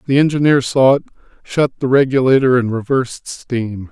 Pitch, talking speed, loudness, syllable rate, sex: 130 Hz, 155 wpm, -15 LUFS, 5.2 syllables/s, male